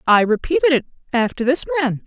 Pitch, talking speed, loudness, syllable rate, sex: 230 Hz, 175 wpm, -18 LUFS, 6.2 syllables/s, female